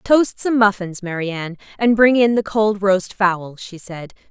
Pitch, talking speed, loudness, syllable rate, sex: 200 Hz, 195 wpm, -17 LUFS, 4.4 syllables/s, female